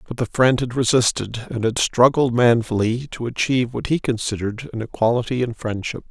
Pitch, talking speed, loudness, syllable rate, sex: 120 Hz, 175 wpm, -20 LUFS, 5.5 syllables/s, male